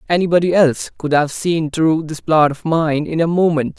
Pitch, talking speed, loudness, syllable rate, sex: 160 Hz, 205 wpm, -16 LUFS, 5.1 syllables/s, male